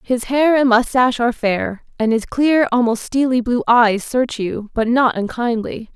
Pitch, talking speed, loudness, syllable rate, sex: 240 Hz, 180 wpm, -17 LUFS, 4.5 syllables/s, female